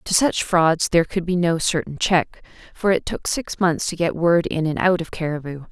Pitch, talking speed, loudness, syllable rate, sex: 170 Hz, 230 wpm, -20 LUFS, 4.9 syllables/s, female